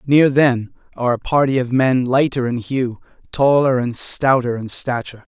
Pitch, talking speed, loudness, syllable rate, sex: 130 Hz, 170 wpm, -17 LUFS, 4.8 syllables/s, male